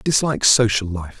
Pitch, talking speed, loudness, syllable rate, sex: 110 Hz, 150 wpm, -17 LUFS, 5.3 syllables/s, male